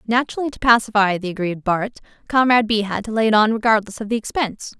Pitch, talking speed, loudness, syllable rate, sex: 220 Hz, 200 wpm, -19 LUFS, 6.8 syllables/s, female